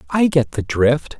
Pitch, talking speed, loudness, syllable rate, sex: 135 Hz, 200 wpm, -17 LUFS, 4.0 syllables/s, male